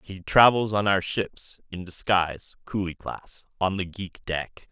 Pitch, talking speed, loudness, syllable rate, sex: 95 Hz, 165 wpm, -25 LUFS, 4.1 syllables/s, male